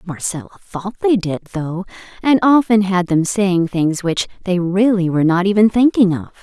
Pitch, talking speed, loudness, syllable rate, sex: 195 Hz, 180 wpm, -16 LUFS, 4.9 syllables/s, female